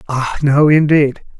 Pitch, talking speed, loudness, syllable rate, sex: 145 Hz, 130 wpm, -13 LUFS, 3.9 syllables/s, male